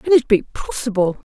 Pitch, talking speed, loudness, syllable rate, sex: 235 Hz, 180 wpm, -19 LUFS, 5.0 syllables/s, female